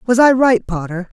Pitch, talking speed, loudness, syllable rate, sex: 220 Hz, 205 wpm, -14 LUFS, 5.1 syllables/s, female